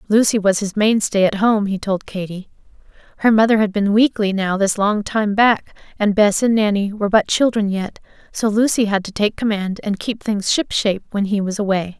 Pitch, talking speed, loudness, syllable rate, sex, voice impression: 205 Hz, 210 wpm, -18 LUFS, 5.2 syllables/s, female, feminine, adult-like, tensed, bright, slightly soft, clear, fluent, intellectual, friendly, reassuring, elegant, lively, slightly kind, slightly sharp